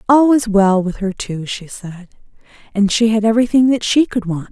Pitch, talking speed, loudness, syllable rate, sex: 215 Hz, 215 wpm, -15 LUFS, 5.0 syllables/s, female